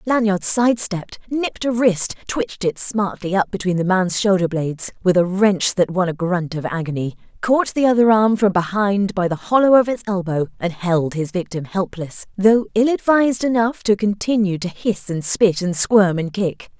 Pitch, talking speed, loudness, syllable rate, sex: 195 Hz, 190 wpm, -18 LUFS, 4.4 syllables/s, female